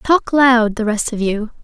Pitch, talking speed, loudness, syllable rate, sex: 235 Hz, 220 wpm, -15 LUFS, 4.0 syllables/s, female